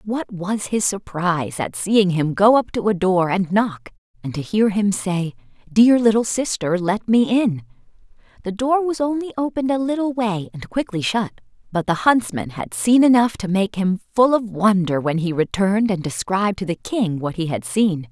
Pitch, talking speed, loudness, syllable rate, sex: 200 Hz, 200 wpm, -19 LUFS, 4.7 syllables/s, female